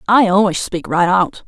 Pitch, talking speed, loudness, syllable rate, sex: 195 Hz, 205 wpm, -15 LUFS, 4.6 syllables/s, female